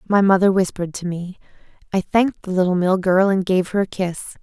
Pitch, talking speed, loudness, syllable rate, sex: 190 Hz, 205 wpm, -19 LUFS, 5.9 syllables/s, female